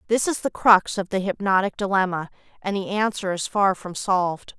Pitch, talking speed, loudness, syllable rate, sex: 195 Hz, 195 wpm, -22 LUFS, 5.2 syllables/s, female